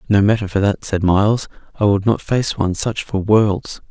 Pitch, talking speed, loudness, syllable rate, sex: 105 Hz, 215 wpm, -17 LUFS, 5.0 syllables/s, male